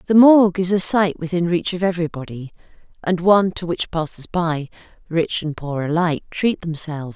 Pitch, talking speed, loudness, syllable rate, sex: 170 Hz, 175 wpm, -19 LUFS, 5.5 syllables/s, female